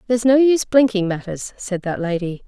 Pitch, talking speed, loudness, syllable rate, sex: 210 Hz, 195 wpm, -18 LUFS, 5.8 syllables/s, female